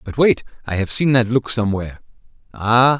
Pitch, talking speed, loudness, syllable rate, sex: 115 Hz, 160 wpm, -18 LUFS, 6.3 syllables/s, male